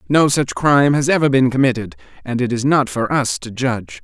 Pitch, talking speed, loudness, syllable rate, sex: 125 Hz, 225 wpm, -17 LUFS, 5.6 syllables/s, male